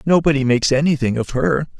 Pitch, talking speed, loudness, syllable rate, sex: 140 Hz, 165 wpm, -17 LUFS, 6.3 syllables/s, male